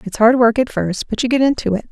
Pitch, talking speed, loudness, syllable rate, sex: 230 Hz, 315 wpm, -16 LUFS, 6.2 syllables/s, female